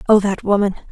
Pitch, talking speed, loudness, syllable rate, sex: 200 Hz, 195 wpm, -17 LUFS, 6.8 syllables/s, female